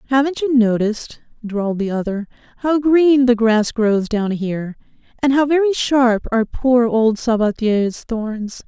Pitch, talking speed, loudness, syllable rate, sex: 235 Hz, 150 wpm, -17 LUFS, 4.3 syllables/s, female